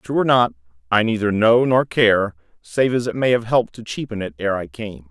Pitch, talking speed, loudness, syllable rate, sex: 110 Hz, 235 wpm, -19 LUFS, 5.3 syllables/s, male